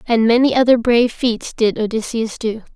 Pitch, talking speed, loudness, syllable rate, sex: 230 Hz, 175 wpm, -16 LUFS, 5.2 syllables/s, female